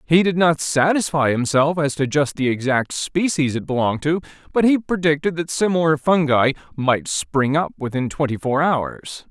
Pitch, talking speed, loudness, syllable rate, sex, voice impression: 145 Hz, 175 wpm, -19 LUFS, 4.8 syllables/s, male, masculine, adult-like, slightly clear, fluent, refreshing, friendly, slightly kind